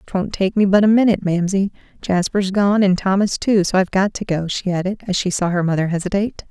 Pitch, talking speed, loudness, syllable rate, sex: 190 Hz, 230 wpm, -18 LUFS, 6.0 syllables/s, female